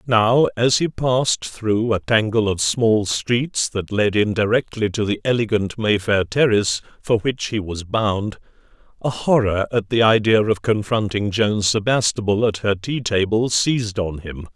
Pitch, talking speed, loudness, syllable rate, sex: 110 Hz, 160 wpm, -19 LUFS, 4.4 syllables/s, male